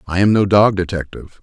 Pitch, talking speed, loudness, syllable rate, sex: 95 Hz, 210 wpm, -15 LUFS, 6.3 syllables/s, male